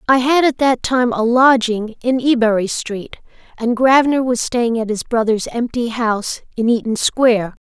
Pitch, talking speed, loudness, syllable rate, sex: 235 Hz, 170 wpm, -16 LUFS, 4.7 syllables/s, female